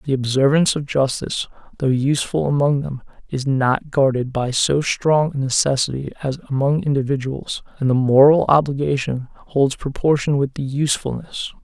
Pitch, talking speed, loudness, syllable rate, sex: 140 Hz, 145 wpm, -19 LUFS, 5.1 syllables/s, male